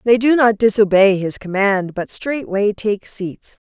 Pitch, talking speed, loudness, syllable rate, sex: 205 Hz, 165 wpm, -17 LUFS, 4.0 syllables/s, female